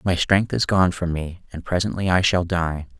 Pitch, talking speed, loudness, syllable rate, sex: 90 Hz, 220 wpm, -21 LUFS, 4.8 syllables/s, male